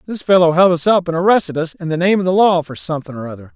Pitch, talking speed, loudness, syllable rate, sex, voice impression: 170 Hz, 305 wpm, -15 LUFS, 7.1 syllables/s, male, very masculine, adult-like, slightly middle-aged, slightly thick, slightly tensed, slightly powerful, very bright, slightly soft, very clear, very fluent, cool, intellectual, very refreshing, very sincere, very calm, slightly mature, very friendly, reassuring, unique, slightly elegant, wild, slightly sweet, very lively, kind, slightly modest, light